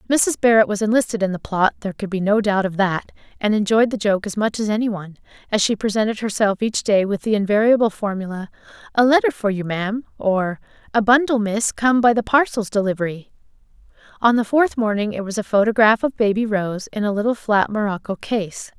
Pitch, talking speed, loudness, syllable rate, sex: 215 Hz, 205 wpm, -19 LUFS, 5.8 syllables/s, female